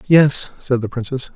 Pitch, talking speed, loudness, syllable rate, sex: 130 Hz, 175 wpm, -17 LUFS, 4.3 syllables/s, male